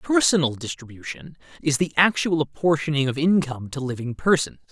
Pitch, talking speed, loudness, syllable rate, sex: 150 Hz, 140 wpm, -22 LUFS, 5.6 syllables/s, male